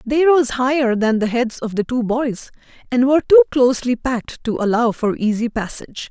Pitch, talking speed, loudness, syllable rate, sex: 250 Hz, 195 wpm, -18 LUFS, 5.3 syllables/s, female